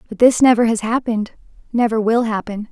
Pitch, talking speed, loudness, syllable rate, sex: 225 Hz, 155 wpm, -17 LUFS, 6.0 syllables/s, female